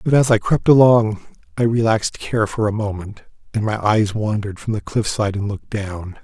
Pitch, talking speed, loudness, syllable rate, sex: 105 Hz, 210 wpm, -18 LUFS, 5.2 syllables/s, male